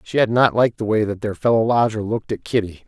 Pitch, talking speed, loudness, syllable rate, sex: 110 Hz, 270 wpm, -19 LUFS, 6.5 syllables/s, male